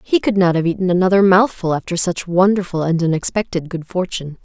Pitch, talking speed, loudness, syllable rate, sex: 180 Hz, 190 wpm, -17 LUFS, 6.0 syllables/s, female